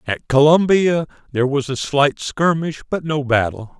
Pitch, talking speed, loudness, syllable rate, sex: 145 Hz, 160 wpm, -18 LUFS, 4.6 syllables/s, male